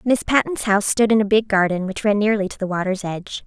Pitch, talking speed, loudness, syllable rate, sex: 205 Hz, 260 wpm, -19 LUFS, 6.2 syllables/s, female